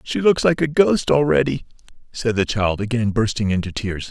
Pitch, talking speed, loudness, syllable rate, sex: 120 Hz, 190 wpm, -19 LUFS, 5.1 syllables/s, male